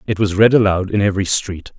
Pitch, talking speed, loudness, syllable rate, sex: 100 Hz, 235 wpm, -15 LUFS, 6.3 syllables/s, male